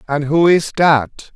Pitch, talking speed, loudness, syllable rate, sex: 150 Hz, 175 wpm, -14 LUFS, 3.6 syllables/s, male